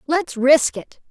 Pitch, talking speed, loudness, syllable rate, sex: 280 Hz, 165 wpm, -17 LUFS, 3.3 syllables/s, female